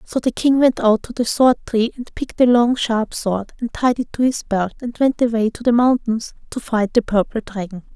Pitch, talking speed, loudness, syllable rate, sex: 230 Hz, 240 wpm, -18 LUFS, 5.1 syllables/s, female